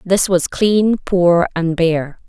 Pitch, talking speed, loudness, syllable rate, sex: 180 Hz, 160 wpm, -15 LUFS, 2.9 syllables/s, female